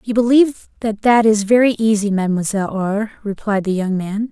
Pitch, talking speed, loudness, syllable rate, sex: 215 Hz, 180 wpm, -17 LUFS, 5.5 syllables/s, female